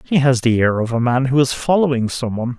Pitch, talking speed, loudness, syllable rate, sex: 125 Hz, 280 wpm, -17 LUFS, 6.2 syllables/s, male